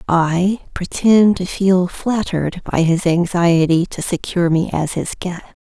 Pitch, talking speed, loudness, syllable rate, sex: 180 Hz, 150 wpm, -17 LUFS, 4.2 syllables/s, female